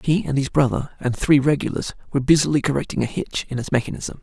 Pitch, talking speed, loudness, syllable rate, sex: 140 Hz, 215 wpm, -21 LUFS, 6.4 syllables/s, male